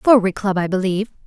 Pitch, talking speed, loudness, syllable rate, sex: 200 Hz, 190 wpm, -19 LUFS, 6.4 syllables/s, female